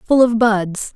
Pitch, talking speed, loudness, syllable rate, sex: 220 Hz, 190 wpm, -16 LUFS, 3.3 syllables/s, female